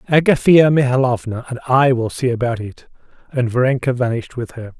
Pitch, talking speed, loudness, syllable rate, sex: 125 Hz, 165 wpm, -17 LUFS, 5.7 syllables/s, male